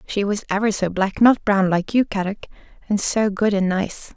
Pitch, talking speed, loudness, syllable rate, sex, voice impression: 200 Hz, 215 wpm, -20 LUFS, 4.9 syllables/s, female, feminine, adult-like, sincere, calm, slightly kind